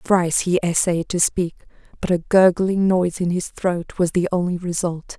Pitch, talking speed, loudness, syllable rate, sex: 175 Hz, 185 wpm, -20 LUFS, 4.8 syllables/s, female